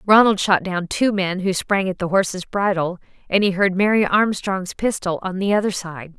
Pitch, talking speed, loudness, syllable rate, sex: 190 Hz, 205 wpm, -20 LUFS, 4.9 syllables/s, female